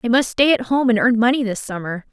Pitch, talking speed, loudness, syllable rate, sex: 235 Hz, 285 wpm, -18 LUFS, 6.0 syllables/s, female